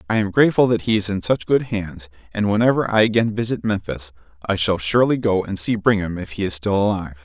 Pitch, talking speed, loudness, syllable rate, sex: 100 Hz, 230 wpm, -19 LUFS, 6.2 syllables/s, male